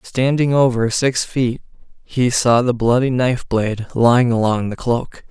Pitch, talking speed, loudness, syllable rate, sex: 120 Hz, 160 wpm, -17 LUFS, 4.5 syllables/s, male